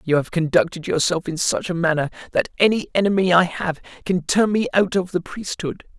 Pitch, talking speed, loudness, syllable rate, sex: 175 Hz, 200 wpm, -20 LUFS, 5.2 syllables/s, male